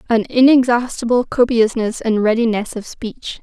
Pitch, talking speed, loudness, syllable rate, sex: 235 Hz, 125 wpm, -16 LUFS, 4.7 syllables/s, female